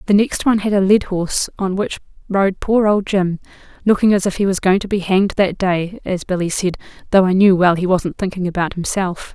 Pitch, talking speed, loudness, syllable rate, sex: 190 Hz, 230 wpm, -17 LUFS, 5.5 syllables/s, female